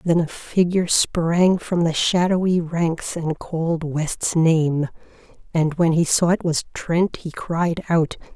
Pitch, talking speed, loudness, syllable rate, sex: 165 Hz, 160 wpm, -20 LUFS, 3.7 syllables/s, female